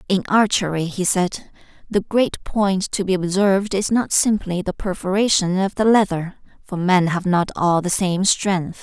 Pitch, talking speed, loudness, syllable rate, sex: 190 Hz, 175 wpm, -19 LUFS, 4.4 syllables/s, female